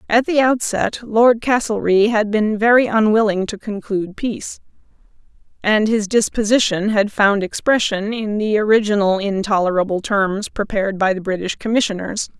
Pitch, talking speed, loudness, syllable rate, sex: 210 Hz, 135 wpm, -17 LUFS, 5.0 syllables/s, female